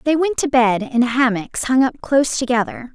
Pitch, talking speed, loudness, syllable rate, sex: 245 Hz, 205 wpm, -18 LUFS, 5.0 syllables/s, female